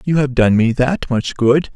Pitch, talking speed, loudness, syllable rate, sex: 130 Hz, 240 wpm, -15 LUFS, 4.4 syllables/s, male